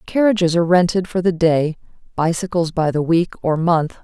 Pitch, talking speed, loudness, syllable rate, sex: 170 Hz, 180 wpm, -18 LUFS, 5.4 syllables/s, female